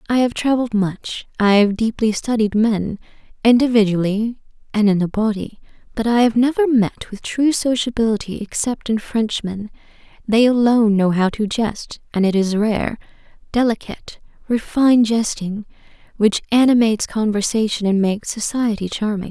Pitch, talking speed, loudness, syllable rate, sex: 220 Hz, 140 wpm, -18 LUFS, 5.0 syllables/s, female